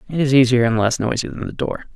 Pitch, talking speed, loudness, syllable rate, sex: 125 Hz, 275 wpm, -18 LUFS, 6.3 syllables/s, male